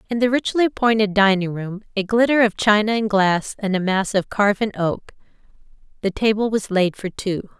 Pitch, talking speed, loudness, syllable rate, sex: 205 Hz, 175 wpm, -19 LUFS, 5.1 syllables/s, female